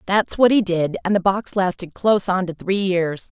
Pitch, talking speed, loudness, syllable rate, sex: 190 Hz, 230 wpm, -20 LUFS, 4.9 syllables/s, female